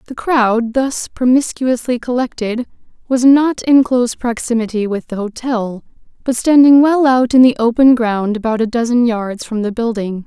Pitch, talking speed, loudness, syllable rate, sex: 240 Hz, 165 wpm, -14 LUFS, 4.7 syllables/s, female